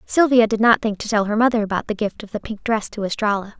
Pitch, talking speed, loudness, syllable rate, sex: 215 Hz, 285 wpm, -19 LUFS, 6.3 syllables/s, female